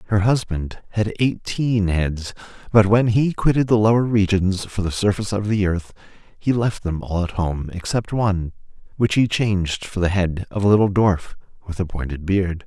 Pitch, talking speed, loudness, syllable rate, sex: 100 Hz, 190 wpm, -20 LUFS, 5.0 syllables/s, male